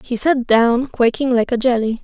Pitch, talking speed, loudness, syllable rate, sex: 245 Hz, 205 wpm, -16 LUFS, 4.7 syllables/s, female